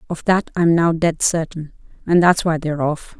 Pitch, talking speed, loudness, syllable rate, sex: 165 Hz, 205 wpm, -18 LUFS, 5.0 syllables/s, female